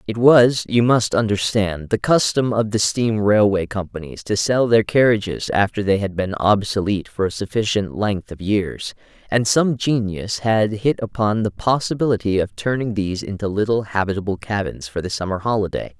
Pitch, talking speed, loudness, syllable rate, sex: 105 Hz, 175 wpm, -19 LUFS, 5.0 syllables/s, male